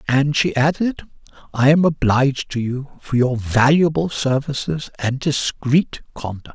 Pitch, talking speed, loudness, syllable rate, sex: 140 Hz, 140 wpm, -19 LUFS, 4.3 syllables/s, male